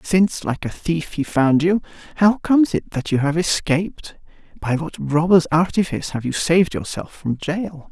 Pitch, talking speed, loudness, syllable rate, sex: 165 Hz, 175 wpm, -20 LUFS, 4.9 syllables/s, male